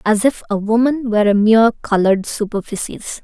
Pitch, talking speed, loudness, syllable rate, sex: 220 Hz, 165 wpm, -16 LUFS, 5.8 syllables/s, female